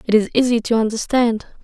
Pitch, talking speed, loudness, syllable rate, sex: 230 Hz, 185 wpm, -18 LUFS, 5.7 syllables/s, female